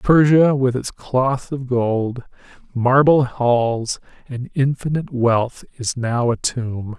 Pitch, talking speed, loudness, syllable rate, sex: 125 Hz, 130 wpm, -19 LUFS, 3.3 syllables/s, male